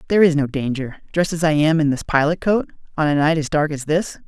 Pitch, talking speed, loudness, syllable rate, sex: 155 Hz, 265 wpm, -19 LUFS, 6.2 syllables/s, male